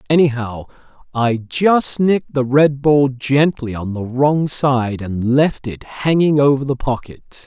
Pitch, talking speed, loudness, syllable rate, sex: 135 Hz, 155 wpm, -16 LUFS, 3.8 syllables/s, male